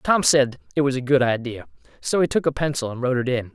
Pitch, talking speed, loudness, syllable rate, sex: 130 Hz, 270 wpm, -21 LUFS, 6.3 syllables/s, male